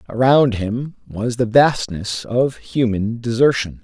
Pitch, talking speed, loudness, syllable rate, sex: 120 Hz, 125 wpm, -18 LUFS, 3.7 syllables/s, male